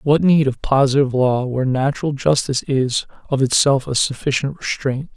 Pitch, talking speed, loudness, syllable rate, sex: 135 Hz, 165 wpm, -18 LUFS, 5.4 syllables/s, male